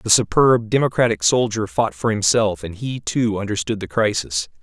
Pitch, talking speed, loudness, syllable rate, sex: 110 Hz, 170 wpm, -19 LUFS, 4.9 syllables/s, male